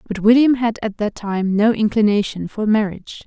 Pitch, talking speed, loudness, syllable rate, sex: 210 Hz, 185 wpm, -18 LUFS, 5.3 syllables/s, female